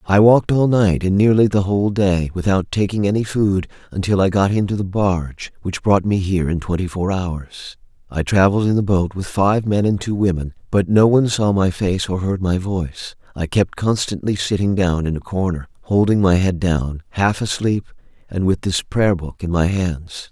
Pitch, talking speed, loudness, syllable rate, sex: 95 Hz, 205 wpm, -18 LUFS, 5.2 syllables/s, male